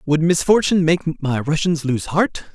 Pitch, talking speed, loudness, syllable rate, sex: 160 Hz, 165 wpm, -18 LUFS, 4.7 syllables/s, male